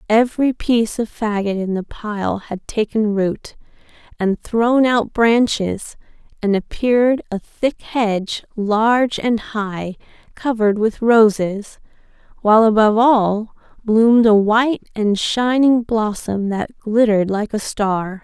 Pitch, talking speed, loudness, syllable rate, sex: 220 Hz, 130 wpm, -17 LUFS, 4.0 syllables/s, female